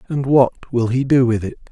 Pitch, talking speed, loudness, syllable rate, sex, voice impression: 125 Hz, 245 wpm, -17 LUFS, 4.9 syllables/s, male, very masculine, slightly old, very thick, slightly tensed, slightly weak, dark, soft, slightly muffled, slightly halting, slightly raspy, cool, intellectual, very sincere, very calm, very mature, friendly, very reassuring, very unique, elegant, very wild, sweet, kind, very modest